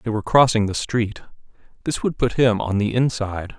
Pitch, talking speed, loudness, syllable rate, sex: 115 Hz, 200 wpm, -20 LUFS, 5.6 syllables/s, male